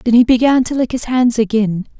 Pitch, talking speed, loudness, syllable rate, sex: 235 Hz, 240 wpm, -14 LUFS, 5.4 syllables/s, female